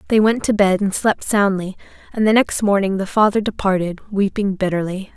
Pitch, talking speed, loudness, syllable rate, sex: 200 Hz, 185 wpm, -18 LUFS, 5.2 syllables/s, female